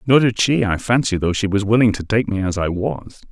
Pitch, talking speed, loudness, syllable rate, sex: 105 Hz, 270 wpm, -18 LUFS, 5.5 syllables/s, male